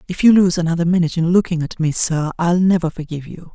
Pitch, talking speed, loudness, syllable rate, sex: 170 Hz, 235 wpm, -17 LUFS, 6.7 syllables/s, male